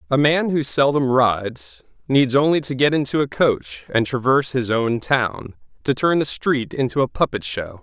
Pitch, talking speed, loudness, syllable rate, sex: 130 Hz, 190 wpm, -19 LUFS, 4.7 syllables/s, male